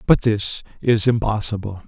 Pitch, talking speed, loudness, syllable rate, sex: 105 Hz, 130 wpm, -20 LUFS, 4.6 syllables/s, male